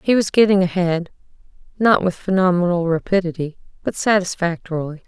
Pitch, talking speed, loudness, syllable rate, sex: 180 Hz, 120 wpm, -19 LUFS, 5.7 syllables/s, female